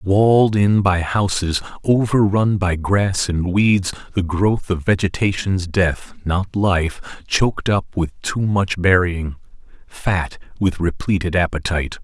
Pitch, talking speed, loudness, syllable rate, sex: 95 Hz, 130 wpm, -19 LUFS, 3.8 syllables/s, male